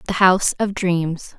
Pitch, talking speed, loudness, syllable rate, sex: 180 Hz, 175 wpm, -19 LUFS, 4.3 syllables/s, female